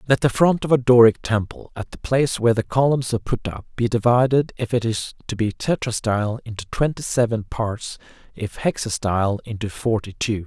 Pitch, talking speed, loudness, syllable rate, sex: 115 Hz, 190 wpm, -21 LUFS, 5.4 syllables/s, male